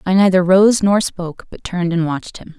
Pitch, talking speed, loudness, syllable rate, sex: 185 Hz, 230 wpm, -15 LUFS, 5.7 syllables/s, female